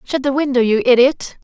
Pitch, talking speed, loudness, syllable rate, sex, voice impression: 260 Hz, 210 wpm, -15 LUFS, 5.5 syllables/s, female, feminine, adult-like, slightly relaxed, powerful, soft, fluent, intellectual, friendly, reassuring, elegant, lively, kind